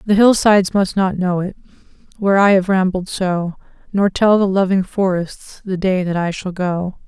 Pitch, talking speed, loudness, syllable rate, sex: 190 Hz, 185 wpm, -17 LUFS, 4.8 syllables/s, female